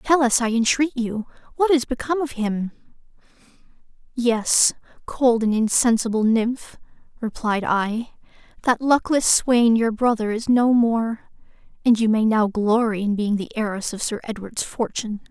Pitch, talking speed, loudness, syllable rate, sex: 230 Hz, 150 wpm, -21 LUFS, 4.5 syllables/s, female